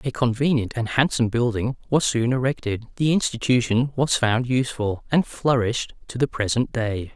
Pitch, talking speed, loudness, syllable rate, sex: 120 Hz, 160 wpm, -22 LUFS, 5.2 syllables/s, male